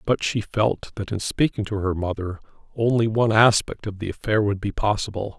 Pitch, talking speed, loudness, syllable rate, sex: 105 Hz, 200 wpm, -23 LUFS, 5.4 syllables/s, male